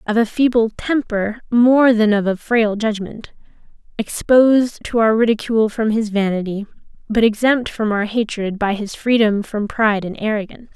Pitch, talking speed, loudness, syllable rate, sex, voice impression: 220 Hz, 160 wpm, -17 LUFS, 4.9 syllables/s, female, feminine, adult-like, tensed, slightly powerful, bright, soft, fluent, intellectual, calm, friendly, elegant, lively, slightly kind